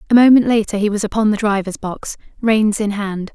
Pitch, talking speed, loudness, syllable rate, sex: 210 Hz, 215 wpm, -16 LUFS, 5.5 syllables/s, female